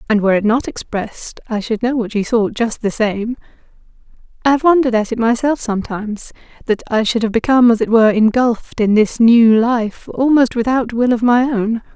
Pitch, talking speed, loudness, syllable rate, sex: 230 Hz, 195 wpm, -15 LUFS, 5.5 syllables/s, female